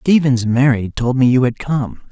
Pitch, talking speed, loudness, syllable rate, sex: 130 Hz, 200 wpm, -15 LUFS, 4.6 syllables/s, male